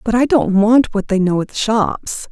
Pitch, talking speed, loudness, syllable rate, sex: 220 Hz, 235 wpm, -15 LUFS, 4.1 syllables/s, female